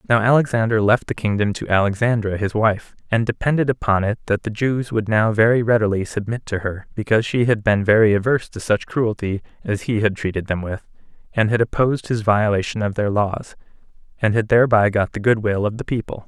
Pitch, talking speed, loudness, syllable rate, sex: 110 Hz, 205 wpm, -19 LUFS, 5.8 syllables/s, male